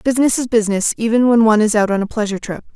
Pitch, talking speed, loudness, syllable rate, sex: 220 Hz, 260 wpm, -15 LUFS, 7.8 syllables/s, female